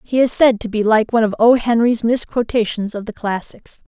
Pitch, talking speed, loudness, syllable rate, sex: 225 Hz, 215 wpm, -16 LUFS, 5.4 syllables/s, female